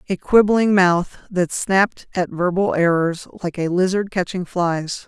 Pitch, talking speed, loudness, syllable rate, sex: 185 Hz, 155 wpm, -19 LUFS, 4.2 syllables/s, female